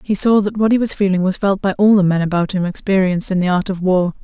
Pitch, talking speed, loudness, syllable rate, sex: 190 Hz, 300 wpm, -16 LUFS, 6.4 syllables/s, female